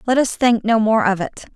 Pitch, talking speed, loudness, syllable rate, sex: 225 Hz, 270 wpm, -17 LUFS, 5.2 syllables/s, female